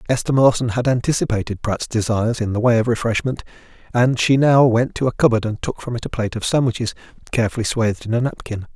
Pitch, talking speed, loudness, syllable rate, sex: 115 Hz, 210 wpm, -19 LUFS, 6.5 syllables/s, male